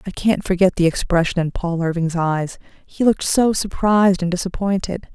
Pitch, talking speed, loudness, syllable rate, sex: 185 Hz, 175 wpm, -19 LUFS, 5.2 syllables/s, female